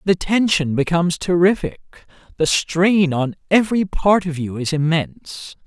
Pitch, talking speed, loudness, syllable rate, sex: 170 Hz, 140 wpm, -18 LUFS, 4.6 syllables/s, male